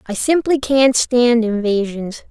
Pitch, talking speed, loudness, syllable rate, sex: 240 Hz, 130 wpm, -16 LUFS, 3.8 syllables/s, female